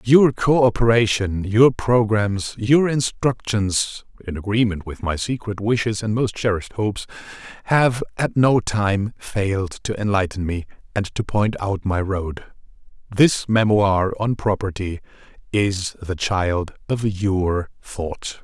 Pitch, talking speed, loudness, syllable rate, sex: 105 Hz, 130 wpm, -20 LUFS, 3.9 syllables/s, male